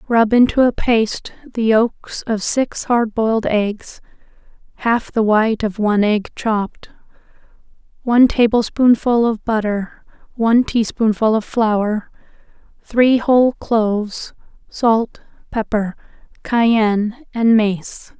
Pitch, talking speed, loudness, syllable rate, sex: 225 Hz, 110 wpm, -17 LUFS, 3.8 syllables/s, female